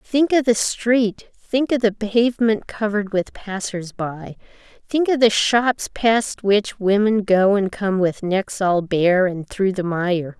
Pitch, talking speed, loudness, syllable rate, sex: 205 Hz, 175 wpm, -19 LUFS, 3.7 syllables/s, female